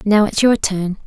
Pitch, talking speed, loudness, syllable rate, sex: 205 Hz, 225 wpm, -16 LUFS, 4.4 syllables/s, female